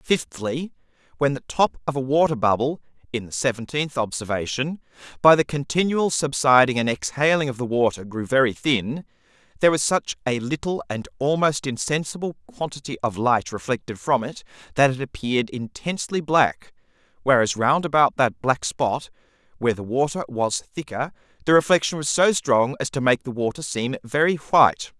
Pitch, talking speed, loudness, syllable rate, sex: 135 Hz, 160 wpm, -22 LUFS, 4.9 syllables/s, male